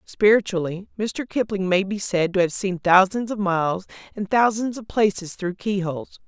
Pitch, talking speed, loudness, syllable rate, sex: 195 Hz, 170 wpm, -22 LUFS, 4.9 syllables/s, female